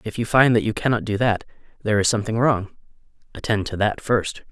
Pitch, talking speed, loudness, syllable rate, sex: 110 Hz, 200 wpm, -21 LUFS, 6.1 syllables/s, male